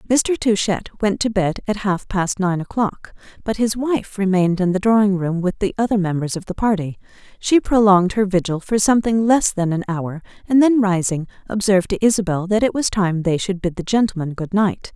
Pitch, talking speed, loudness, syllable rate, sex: 195 Hz, 210 wpm, -19 LUFS, 5.4 syllables/s, female